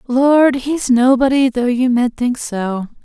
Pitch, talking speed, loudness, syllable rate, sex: 255 Hz, 160 wpm, -15 LUFS, 3.6 syllables/s, female